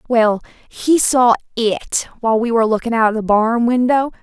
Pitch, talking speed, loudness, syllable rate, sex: 230 Hz, 185 wpm, -16 LUFS, 5.0 syllables/s, female